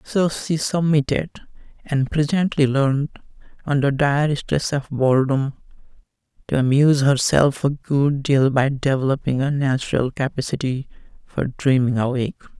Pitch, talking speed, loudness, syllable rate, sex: 140 Hz, 120 wpm, -20 LUFS, 4.5 syllables/s, male